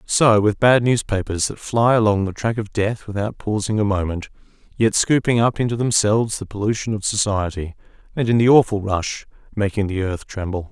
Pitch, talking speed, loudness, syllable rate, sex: 105 Hz, 185 wpm, -19 LUFS, 5.3 syllables/s, male